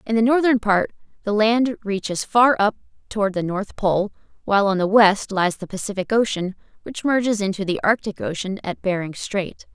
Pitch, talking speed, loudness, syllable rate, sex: 205 Hz, 185 wpm, -21 LUFS, 5.2 syllables/s, female